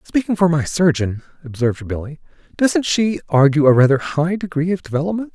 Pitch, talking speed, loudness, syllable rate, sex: 160 Hz, 170 wpm, -17 LUFS, 5.6 syllables/s, male